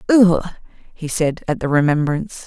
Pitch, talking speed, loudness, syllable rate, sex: 165 Hz, 145 wpm, -18 LUFS, 5.0 syllables/s, female